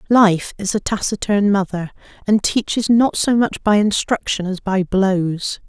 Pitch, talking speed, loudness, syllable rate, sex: 200 Hz, 160 wpm, -18 LUFS, 4.2 syllables/s, female